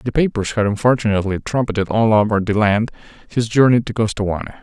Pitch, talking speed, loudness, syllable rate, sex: 110 Hz, 170 wpm, -17 LUFS, 6.2 syllables/s, male